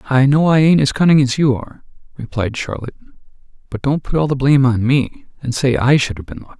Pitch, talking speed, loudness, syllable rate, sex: 130 Hz, 245 wpm, -15 LUFS, 6.5 syllables/s, male